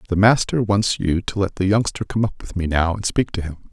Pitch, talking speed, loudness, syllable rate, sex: 100 Hz, 275 wpm, -20 LUFS, 5.6 syllables/s, male